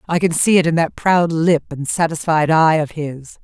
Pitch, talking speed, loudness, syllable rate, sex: 160 Hz, 225 wpm, -16 LUFS, 4.7 syllables/s, female